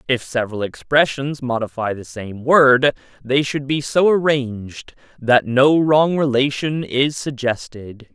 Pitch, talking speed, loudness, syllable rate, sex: 135 Hz, 135 wpm, -18 LUFS, 4.0 syllables/s, male